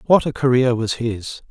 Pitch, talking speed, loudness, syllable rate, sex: 125 Hz, 200 wpm, -19 LUFS, 4.7 syllables/s, male